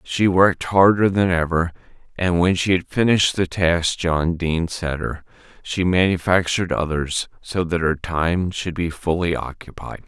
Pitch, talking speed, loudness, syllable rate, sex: 85 Hz, 160 wpm, -20 LUFS, 4.6 syllables/s, male